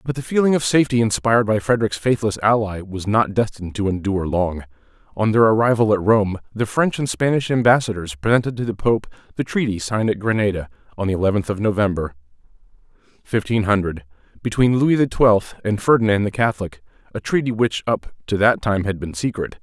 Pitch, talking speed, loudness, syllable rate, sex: 105 Hz, 185 wpm, -19 LUFS, 6.0 syllables/s, male